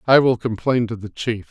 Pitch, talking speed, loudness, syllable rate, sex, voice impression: 120 Hz, 240 wpm, -20 LUFS, 5.2 syllables/s, male, very masculine, old, very thick, relaxed, very powerful, dark, slightly hard, clear, fluent, raspy, slightly cool, intellectual, very sincere, very calm, very mature, slightly friendly, slightly reassuring, very unique, slightly elegant, very wild, slightly sweet, slightly lively, strict, slightly intense, slightly sharp